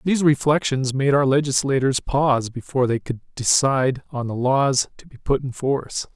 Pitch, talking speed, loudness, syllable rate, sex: 135 Hz, 175 wpm, -21 LUFS, 5.3 syllables/s, male